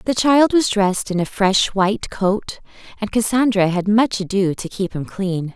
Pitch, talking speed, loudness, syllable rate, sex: 205 Hz, 195 wpm, -18 LUFS, 4.5 syllables/s, female